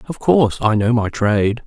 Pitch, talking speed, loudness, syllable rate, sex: 115 Hz, 215 wpm, -16 LUFS, 5.6 syllables/s, male